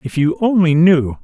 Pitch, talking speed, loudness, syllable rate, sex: 165 Hz, 195 wpm, -14 LUFS, 4.6 syllables/s, male